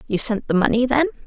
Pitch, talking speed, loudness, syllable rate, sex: 235 Hz, 235 wpm, -19 LUFS, 6.3 syllables/s, female